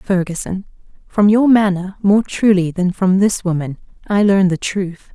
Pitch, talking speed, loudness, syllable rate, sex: 190 Hz, 165 wpm, -16 LUFS, 4.4 syllables/s, female